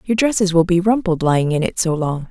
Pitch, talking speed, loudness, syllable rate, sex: 180 Hz, 260 wpm, -17 LUFS, 5.9 syllables/s, female